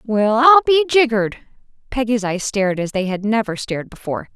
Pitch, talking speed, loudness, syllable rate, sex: 230 Hz, 180 wpm, -17 LUFS, 6.0 syllables/s, female